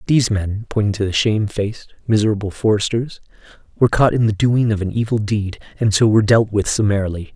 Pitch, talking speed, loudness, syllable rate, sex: 105 Hz, 190 wpm, -18 LUFS, 6.2 syllables/s, male